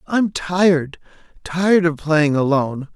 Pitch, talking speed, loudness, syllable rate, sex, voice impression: 165 Hz, 100 wpm, -18 LUFS, 4.3 syllables/s, male, masculine, adult-like, tensed, powerful, bright, slightly muffled, raspy, slightly mature, friendly, unique, wild, lively, slightly intense